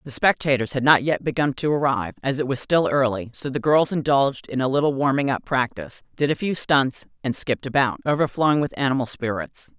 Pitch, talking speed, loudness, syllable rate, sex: 135 Hz, 210 wpm, -22 LUFS, 5.9 syllables/s, female